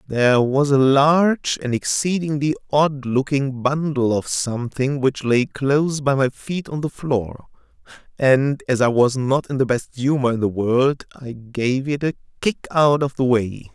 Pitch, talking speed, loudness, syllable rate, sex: 140 Hz, 180 wpm, -19 LUFS, 4.3 syllables/s, male